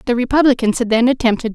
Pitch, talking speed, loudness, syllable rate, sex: 240 Hz, 235 wpm, -15 LUFS, 7.6 syllables/s, female